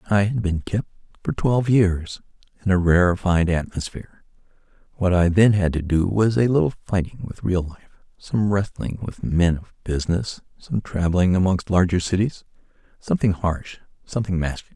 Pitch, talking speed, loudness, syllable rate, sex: 95 Hz, 160 wpm, -21 LUFS, 5.4 syllables/s, male